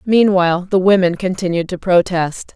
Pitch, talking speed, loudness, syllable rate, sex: 185 Hz, 140 wpm, -15 LUFS, 5.0 syllables/s, female